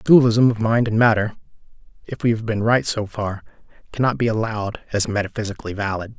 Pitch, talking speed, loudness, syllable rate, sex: 110 Hz, 185 wpm, -20 LUFS, 6.3 syllables/s, male